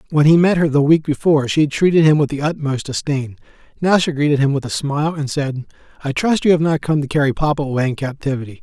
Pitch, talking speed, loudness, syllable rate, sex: 145 Hz, 245 wpm, -17 LUFS, 6.3 syllables/s, male